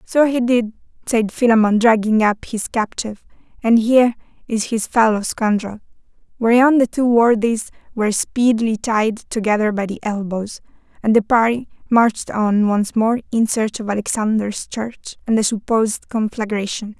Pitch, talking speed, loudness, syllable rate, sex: 220 Hz, 150 wpm, -18 LUFS, 4.9 syllables/s, female